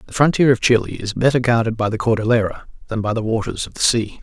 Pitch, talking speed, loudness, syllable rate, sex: 115 Hz, 240 wpm, -18 LUFS, 6.6 syllables/s, male